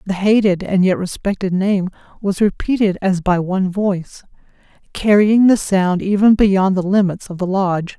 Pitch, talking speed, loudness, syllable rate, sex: 195 Hz, 165 wpm, -16 LUFS, 4.9 syllables/s, female